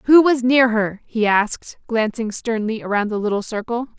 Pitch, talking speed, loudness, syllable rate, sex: 225 Hz, 180 wpm, -19 LUFS, 5.0 syllables/s, female